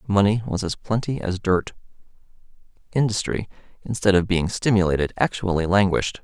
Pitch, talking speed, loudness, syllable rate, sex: 95 Hz, 125 wpm, -22 LUFS, 5.6 syllables/s, male